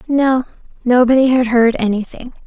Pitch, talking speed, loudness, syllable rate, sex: 245 Hz, 120 wpm, -14 LUFS, 5.0 syllables/s, female